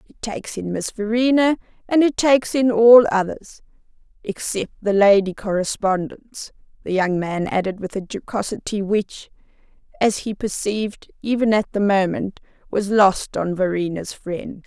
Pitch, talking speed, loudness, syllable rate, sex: 205 Hz, 140 wpm, -20 LUFS, 4.6 syllables/s, female